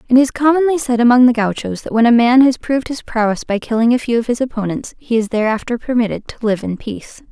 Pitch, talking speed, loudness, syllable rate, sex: 240 Hz, 245 wpm, -15 LUFS, 6.3 syllables/s, female